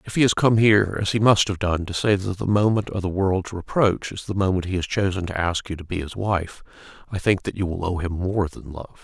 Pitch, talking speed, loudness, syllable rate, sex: 95 Hz, 280 wpm, -22 LUFS, 5.7 syllables/s, male